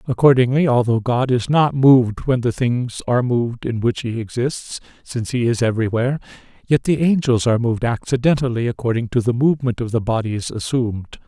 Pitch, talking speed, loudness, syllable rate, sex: 125 Hz, 175 wpm, -18 LUFS, 5.8 syllables/s, male